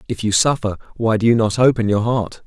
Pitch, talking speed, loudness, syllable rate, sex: 110 Hz, 245 wpm, -17 LUFS, 5.8 syllables/s, male